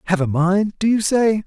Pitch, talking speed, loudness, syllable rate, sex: 195 Hz, 245 wpm, -18 LUFS, 4.8 syllables/s, male